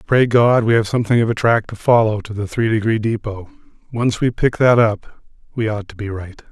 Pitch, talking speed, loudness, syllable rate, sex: 110 Hz, 220 wpm, -17 LUFS, 5.4 syllables/s, male